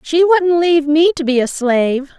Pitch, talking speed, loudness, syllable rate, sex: 305 Hz, 220 wpm, -14 LUFS, 5.1 syllables/s, female